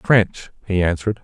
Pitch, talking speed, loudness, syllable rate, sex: 95 Hz, 145 wpm, -19 LUFS, 4.9 syllables/s, male